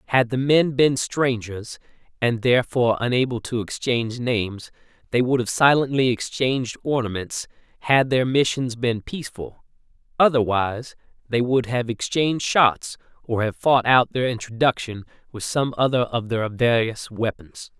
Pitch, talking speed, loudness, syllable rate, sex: 120 Hz, 135 wpm, -21 LUFS, 4.7 syllables/s, male